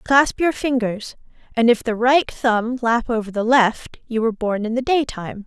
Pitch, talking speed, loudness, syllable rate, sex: 235 Hz, 200 wpm, -19 LUFS, 4.7 syllables/s, female